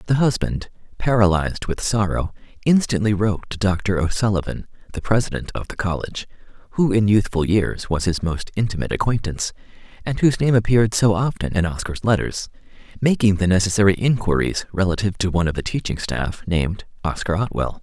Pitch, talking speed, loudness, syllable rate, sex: 100 Hz, 160 wpm, -21 LUFS, 6.0 syllables/s, male